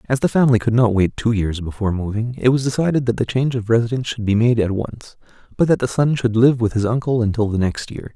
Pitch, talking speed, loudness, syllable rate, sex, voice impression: 115 Hz, 265 wpm, -18 LUFS, 6.4 syllables/s, male, very masculine, very adult-like, old, relaxed, weak, slightly dark, very soft, muffled, very fluent, slightly raspy, very cool, very intellectual, slightly refreshing, sincere, very calm, very mature, very friendly, very reassuring, unique, elegant, very sweet, slightly lively, very kind, very modest